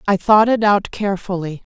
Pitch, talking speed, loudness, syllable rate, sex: 195 Hz, 170 wpm, -16 LUFS, 5.3 syllables/s, female